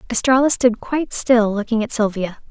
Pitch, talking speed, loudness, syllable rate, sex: 230 Hz, 170 wpm, -18 LUFS, 5.4 syllables/s, female